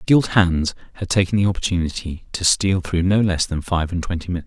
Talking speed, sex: 270 wpm, male